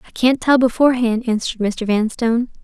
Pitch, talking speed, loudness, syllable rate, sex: 235 Hz, 160 wpm, -17 LUFS, 6.0 syllables/s, female